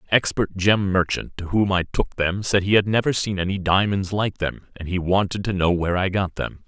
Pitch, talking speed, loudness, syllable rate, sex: 95 Hz, 245 wpm, -22 LUFS, 5.4 syllables/s, male